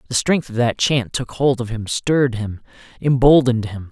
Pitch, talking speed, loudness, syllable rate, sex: 125 Hz, 200 wpm, -18 LUFS, 5.1 syllables/s, male